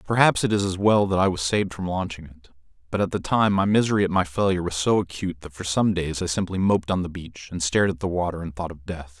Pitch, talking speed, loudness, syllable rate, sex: 90 Hz, 280 wpm, -23 LUFS, 6.5 syllables/s, male